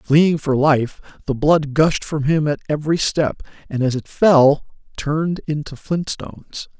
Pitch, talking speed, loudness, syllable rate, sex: 150 Hz, 170 wpm, -18 LUFS, 4.2 syllables/s, male